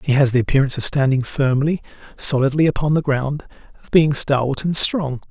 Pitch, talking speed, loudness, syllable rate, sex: 140 Hz, 180 wpm, -18 LUFS, 5.6 syllables/s, male